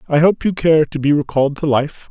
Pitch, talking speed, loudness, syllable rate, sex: 150 Hz, 255 wpm, -16 LUFS, 5.7 syllables/s, male